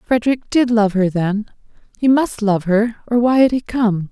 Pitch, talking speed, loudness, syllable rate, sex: 225 Hz, 190 wpm, -17 LUFS, 4.7 syllables/s, female